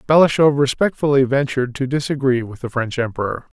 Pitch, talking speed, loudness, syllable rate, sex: 135 Hz, 150 wpm, -18 LUFS, 5.8 syllables/s, male